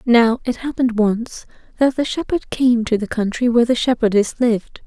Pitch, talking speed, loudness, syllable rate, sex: 235 Hz, 185 wpm, -18 LUFS, 5.2 syllables/s, female